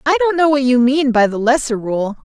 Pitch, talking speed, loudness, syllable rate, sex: 260 Hz, 260 wpm, -15 LUFS, 5.4 syllables/s, female